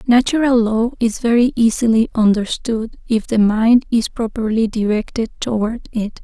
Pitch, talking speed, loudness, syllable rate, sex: 225 Hz, 135 wpm, -17 LUFS, 4.5 syllables/s, female